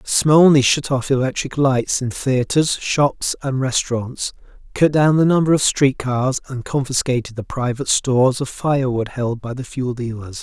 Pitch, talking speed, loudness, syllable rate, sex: 130 Hz, 180 wpm, -18 LUFS, 4.6 syllables/s, male